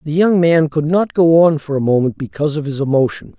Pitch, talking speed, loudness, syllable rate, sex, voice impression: 155 Hz, 250 wpm, -15 LUFS, 5.9 syllables/s, male, masculine, middle-aged, relaxed, slightly powerful, soft, slightly muffled, raspy, calm, friendly, slightly reassuring, slightly wild, kind, slightly modest